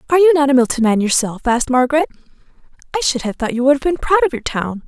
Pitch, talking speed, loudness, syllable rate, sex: 260 Hz, 260 wpm, -16 LUFS, 7.4 syllables/s, female